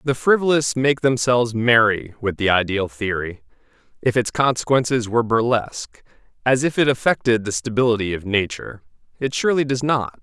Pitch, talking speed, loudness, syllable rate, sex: 120 Hz, 155 wpm, -19 LUFS, 5.5 syllables/s, male